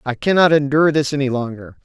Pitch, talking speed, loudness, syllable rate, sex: 140 Hz, 195 wpm, -16 LUFS, 6.4 syllables/s, male